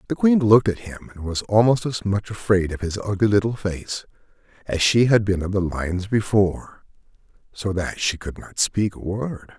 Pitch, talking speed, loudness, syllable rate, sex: 100 Hz, 200 wpm, -21 LUFS, 4.8 syllables/s, male